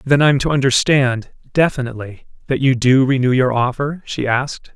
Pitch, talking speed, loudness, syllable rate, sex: 130 Hz, 140 wpm, -16 LUFS, 5.2 syllables/s, male